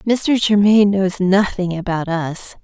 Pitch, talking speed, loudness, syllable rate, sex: 195 Hz, 135 wpm, -16 LUFS, 3.9 syllables/s, female